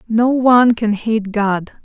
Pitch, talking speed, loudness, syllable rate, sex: 225 Hz, 165 wpm, -15 LUFS, 3.8 syllables/s, female